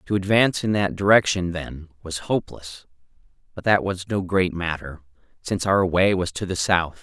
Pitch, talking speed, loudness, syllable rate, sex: 90 Hz, 180 wpm, -22 LUFS, 5.1 syllables/s, male